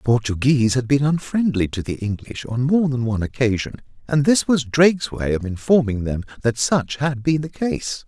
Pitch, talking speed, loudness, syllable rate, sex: 130 Hz, 200 wpm, -20 LUFS, 5.2 syllables/s, male